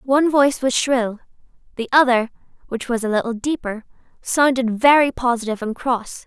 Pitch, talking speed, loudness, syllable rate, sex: 245 Hz, 155 wpm, -19 LUFS, 5.3 syllables/s, female